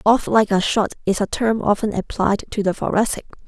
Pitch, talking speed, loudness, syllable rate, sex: 210 Hz, 205 wpm, -20 LUFS, 5.3 syllables/s, female